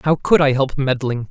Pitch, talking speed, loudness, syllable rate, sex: 135 Hz, 230 wpm, -17 LUFS, 5.2 syllables/s, male